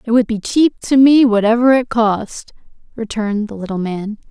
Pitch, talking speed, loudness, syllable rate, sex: 225 Hz, 195 wpm, -15 LUFS, 5.0 syllables/s, female